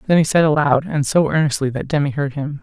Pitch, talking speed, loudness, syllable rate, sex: 145 Hz, 250 wpm, -17 LUFS, 6.2 syllables/s, female